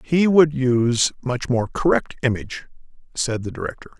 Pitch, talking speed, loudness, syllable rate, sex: 130 Hz, 150 wpm, -20 LUFS, 5.1 syllables/s, male